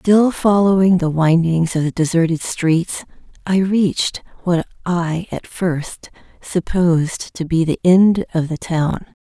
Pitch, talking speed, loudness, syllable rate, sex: 175 Hz, 145 wpm, -17 LUFS, 3.8 syllables/s, female